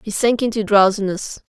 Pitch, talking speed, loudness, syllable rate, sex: 210 Hz, 160 wpm, -17 LUFS, 5.2 syllables/s, female